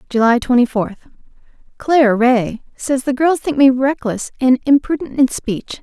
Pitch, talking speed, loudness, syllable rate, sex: 255 Hz, 145 wpm, -15 LUFS, 4.7 syllables/s, female